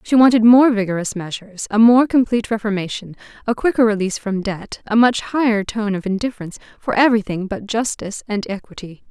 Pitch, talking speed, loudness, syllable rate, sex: 215 Hz, 170 wpm, -17 LUFS, 6.1 syllables/s, female